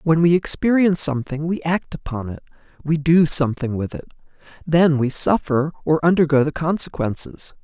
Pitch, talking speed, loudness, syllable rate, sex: 155 Hz, 155 wpm, -19 LUFS, 5.4 syllables/s, male